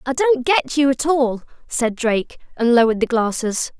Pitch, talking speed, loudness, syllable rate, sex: 255 Hz, 190 wpm, -18 LUFS, 4.9 syllables/s, female